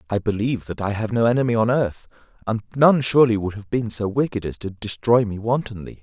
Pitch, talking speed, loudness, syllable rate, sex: 110 Hz, 220 wpm, -21 LUFS, 6.0 syllables/s, male